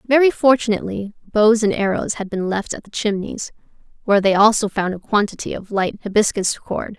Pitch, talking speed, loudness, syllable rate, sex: 210 Hz, 180 wpm, -19 LUFS, 5.6 syllables/s, female